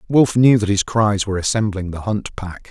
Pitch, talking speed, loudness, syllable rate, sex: 105 Hz, 220 wpm, -17 LUFS, 5.1 syllables/s, male